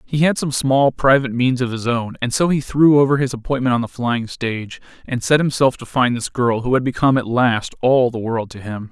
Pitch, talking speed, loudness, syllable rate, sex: 125 Hz, 250 wpm, -18 LUFS, 5.5 syllables/s, male